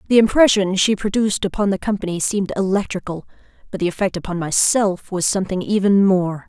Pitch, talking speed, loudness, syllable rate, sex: 195 Hz, 165 wpm, -18 LUFS, 6.1 syllables/s, female